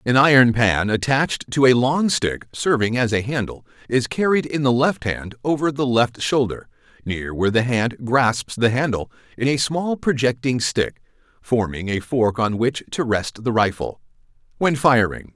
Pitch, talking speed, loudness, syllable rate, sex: 125 Hz, 175 wpm, -20 LUFS, 4.7 syllables/s, male